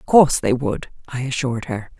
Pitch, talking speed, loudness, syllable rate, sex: 130 Hz, 210 wpm, -20 LUFS, 5.8 syllables/s, female